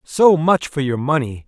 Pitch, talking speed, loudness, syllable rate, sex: 145 Hz, 205 wpm, -17 LUFS, 4.4 syllables/s, male